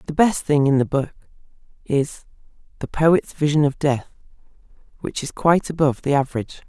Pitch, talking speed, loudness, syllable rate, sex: 145 Hz, 160 wpm, -20 LUFS, 5.8 syllables/s, female